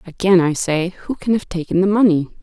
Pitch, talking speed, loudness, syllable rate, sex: 180 Hz, 225 wpm, -17 LUFS, 5.3 syllables/s, female